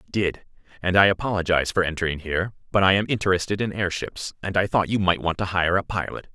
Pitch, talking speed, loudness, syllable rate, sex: 95 Hz, 225 wpm, -23 LUFS, 6.4 syllables/s, male